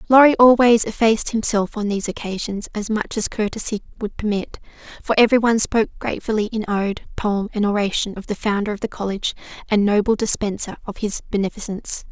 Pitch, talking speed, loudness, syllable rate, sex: 210 Hz, 170 wpm, -20 LUFS, 6.2 syllables/s, female